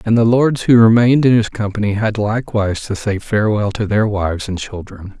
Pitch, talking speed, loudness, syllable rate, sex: 105 Hz, 210 wpm, -15 LUFS, 5.7 syllables/s, male